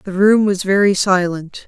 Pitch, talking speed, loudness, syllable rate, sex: 190 Hz, 180 wpm, -15 LUFS, 4.3 syllables/s, female